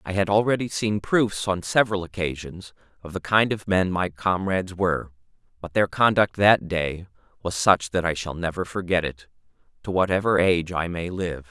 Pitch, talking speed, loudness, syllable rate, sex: 90 Hz, 180 wpm, -23 LUFS, 5.1 syllables/s, male